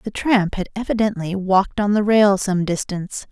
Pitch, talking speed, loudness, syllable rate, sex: 200 Hz, 180 wpm, -19 LUFS, 5.1 syllables/s, female